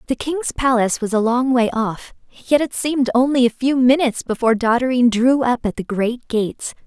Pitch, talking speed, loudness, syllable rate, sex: 245 Hz, 200 wpm, -18 LUFS, 5.6 syllables/s, female